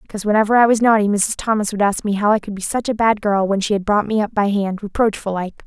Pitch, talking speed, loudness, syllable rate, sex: 210 Hz, 285 wpm, -18 LUFS, 6.5 syllables/s, female